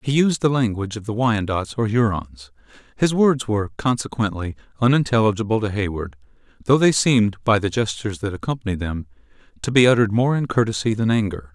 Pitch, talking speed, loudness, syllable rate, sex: 110 Hz, 170 wpm, -20 LUFS, 6.1 syllables/s, male